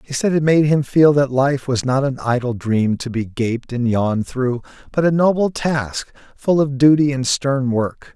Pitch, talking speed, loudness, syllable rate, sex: 135 Hz, 215 wpm, -18 LUFS, 4.4 syllables/s, male